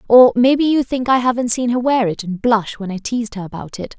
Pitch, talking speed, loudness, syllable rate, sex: 235 Hz, 270 wpm, -16 LUFS, 5.8 syllables/s, female